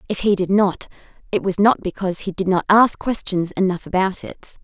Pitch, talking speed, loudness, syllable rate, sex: 190 Hz, 205 wpm, -19 LUFS, 5.3 syllables/s, female